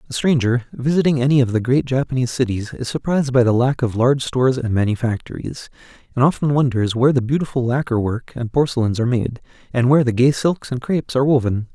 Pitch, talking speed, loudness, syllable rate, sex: 125 Hz, 205 wpm, -18 LUFS, 6.5 syllables/s, male